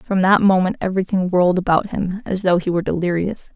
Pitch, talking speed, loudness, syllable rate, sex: 185 Hz, 200 wpm, -18 LUFS, 6.1 syllables/s, female